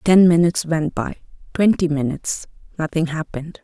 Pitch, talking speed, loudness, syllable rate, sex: 165 Hz, 100 wpm, -19 LUFS, 5.4 syllables/s, female